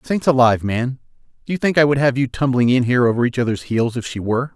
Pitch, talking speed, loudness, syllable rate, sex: 125 Hz, 265 wpm, -18 LUFS, 6.8 syllables/s, male